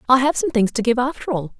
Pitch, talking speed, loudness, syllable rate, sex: 240 Hz, 300 wpm, -19 LUFS, 6.5 syllables/s, female